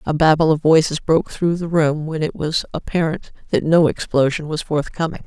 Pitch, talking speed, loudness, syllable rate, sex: 155 Hz, 195 wpm, -18 LUFS, 5.3 syllables/s, female